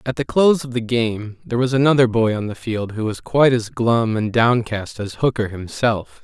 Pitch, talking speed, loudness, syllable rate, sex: 115 Hz, 220 wpm, -19 LUFS, 5.1 syllables/s, male